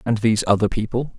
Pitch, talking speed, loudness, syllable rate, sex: 110 Hz, 205 wpm, -20 LUFS, 6.7 syllables/s, male